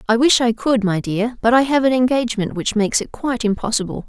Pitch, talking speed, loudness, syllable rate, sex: 235 Hz, 235 wpm, -18 LUFS, 6.2 syllables/s, female